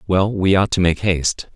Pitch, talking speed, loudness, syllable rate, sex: 90 Hz, 230 wpm, -17 LUFS, 5.2 syllables/s, male